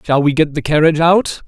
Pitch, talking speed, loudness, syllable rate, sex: 155 Hz, 245 wpm, -14 LUFS, 6.2 syllables/s, male